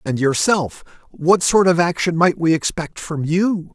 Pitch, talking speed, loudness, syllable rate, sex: 170 Hz, 160 wpm, -18 LUFS, 4.1 syllables/s, male